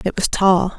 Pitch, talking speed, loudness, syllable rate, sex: 190 Hz, 230 wpm, -17 LUFS, 4.4 syllables/s, female